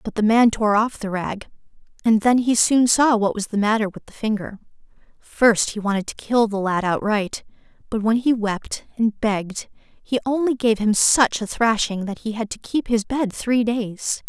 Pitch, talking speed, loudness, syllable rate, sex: 220 Hz, 205 wpm, -20 LUFS, 4.6 syllables/s, female